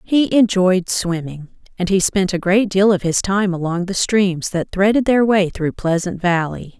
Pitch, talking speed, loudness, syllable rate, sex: 190 Hz, 195 wpm, -17 LUFS, 4.4 syllables/s, female